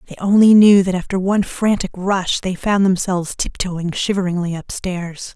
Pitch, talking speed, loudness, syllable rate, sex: 190 Hz, 155 wpm, -17 LUFS, 5.0 syllables/s, female